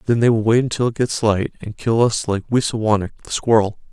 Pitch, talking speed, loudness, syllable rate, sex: 110 Hz, 230 wpm, -19 LUFS, 5.8 syllables/s, male